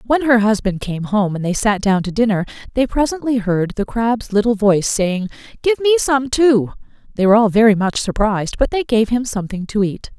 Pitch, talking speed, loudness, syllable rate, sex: 220 Hz, 210 wpm, -17 LUFS, 5.5 syllables/s, female